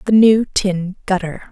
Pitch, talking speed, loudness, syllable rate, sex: 195 Hz, 160 wpm, -16 LUFS, 3.9 syllables/s, female